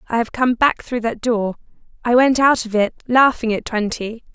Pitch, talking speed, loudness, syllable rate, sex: 235 Hz, 205 wpm, -18 LUFS, 4.8 syllables/s, female